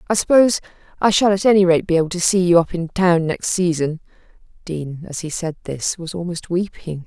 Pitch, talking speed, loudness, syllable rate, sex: 175 Hz, 220 wpm, -18 LUFS, 5.8 syllables/s, female